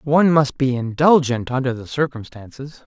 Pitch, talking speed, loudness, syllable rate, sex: 135 Hz, 145 wpm, -18 LUFS, 5.1 syllables/s, male